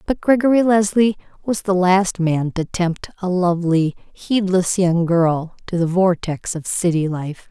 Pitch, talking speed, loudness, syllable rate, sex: 180 Hz, 160 wpm, -18 LUFS, 4.1 syllables/s, female